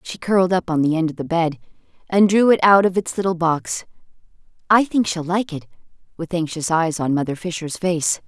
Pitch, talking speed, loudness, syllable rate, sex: 170 Hz, 210 wpm, -19 LUFS, 5.4 syllables/s, female